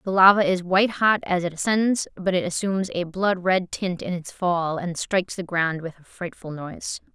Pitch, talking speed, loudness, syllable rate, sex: 180 Hz, 220 wpm, -23 LUFS, 5.0 syllables/s, female